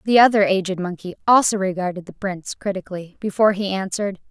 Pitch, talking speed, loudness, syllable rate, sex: 190 Hz, 165 wpm, -20 LUFS, 6.6 syllables/s, female